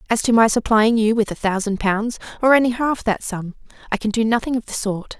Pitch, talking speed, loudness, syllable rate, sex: 225 Hz, 245 wpm, -19 LUFS, 5.7 syllables/s, female